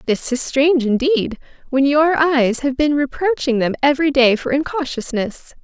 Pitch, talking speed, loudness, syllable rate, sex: 275 Hz, 160 wpm, -17 LUFS, 4.8 syllables/s, female